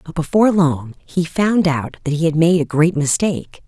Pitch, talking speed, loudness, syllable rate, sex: 165 Hz, 210 wpm, -17 LUFS, 5.1 syllables/s, female